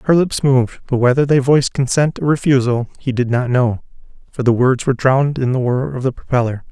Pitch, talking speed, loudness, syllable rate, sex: 130 Hz, 225 wpm, -16 LUFS, 5.9 syllables/s, male